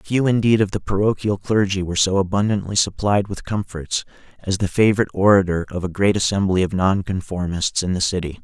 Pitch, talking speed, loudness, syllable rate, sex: 95 Hz, 180 wpm, -20 LUFS, 5.7 syllables/s, male